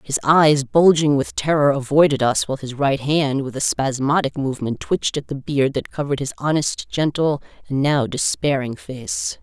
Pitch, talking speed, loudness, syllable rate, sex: 140 Hz, 180 wpm, -19 LUFS, 4.9 syllables/s, female